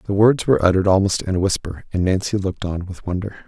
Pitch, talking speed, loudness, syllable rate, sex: 95 Hz, 240 wpm, -19 LUFS, 6.8 syllables/s, male